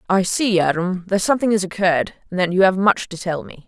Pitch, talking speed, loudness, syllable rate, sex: 185 Hz, 245 wpm, -19 LUFS, 6.1 syllables/s, female